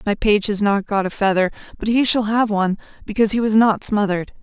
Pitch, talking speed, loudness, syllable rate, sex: 210 Hz, 230 wpm, -18 LUFS, 6.2 syllables/s, female